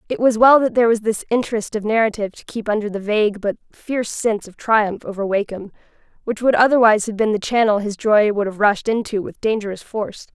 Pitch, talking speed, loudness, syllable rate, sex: 215 Hz, 220 wpm, -18 LUFS, 6.2 syllables/s, female